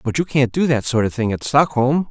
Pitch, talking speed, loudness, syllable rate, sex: 130 Hz, 285 wpm, -18 LUFS, 5.5 syllables/s, male